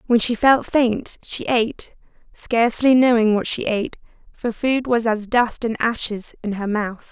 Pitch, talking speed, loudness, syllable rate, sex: 230 Hz, 175 wpm, -19 LUFS, 4.4 syllables/s, female